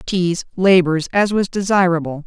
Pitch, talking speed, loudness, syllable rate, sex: 180 Hz, 130 wpm, -17 LUFS, 4.5 syllables/s, female